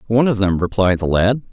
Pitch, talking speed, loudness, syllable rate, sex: 105 Hz, 235 wpm, -17 LUFS, 6.2 syllables/s, male